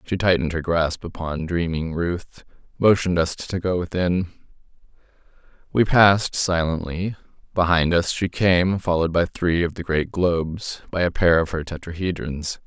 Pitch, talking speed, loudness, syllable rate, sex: 85 Hz, 150 wpm, -22 LUFS, 4.8 syllables/s, male